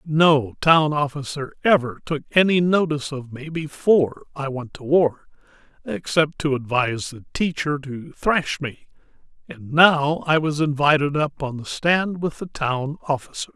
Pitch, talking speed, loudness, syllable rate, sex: 150 Hz, 155 wpm, -21 LUFS, 4.5 syllables/s, male